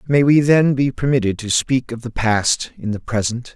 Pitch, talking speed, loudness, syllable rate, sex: 125 Hz, 220 wpm, -18 LUFS, 4.8 syllables/s, male